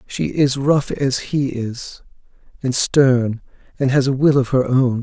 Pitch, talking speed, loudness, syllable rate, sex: 130 Hz, 180 wpm, -18 LUFS, 3.8 syllables/s, male